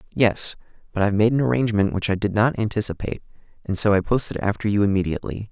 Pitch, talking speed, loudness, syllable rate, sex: 105 Hz, 185 wpm, -22 LUFS, 7.2 syllables/s, male